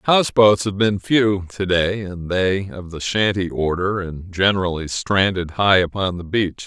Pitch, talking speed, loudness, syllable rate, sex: 95 Hz, 170 wpm, -19 LUFS, 4.4 syllables/s, male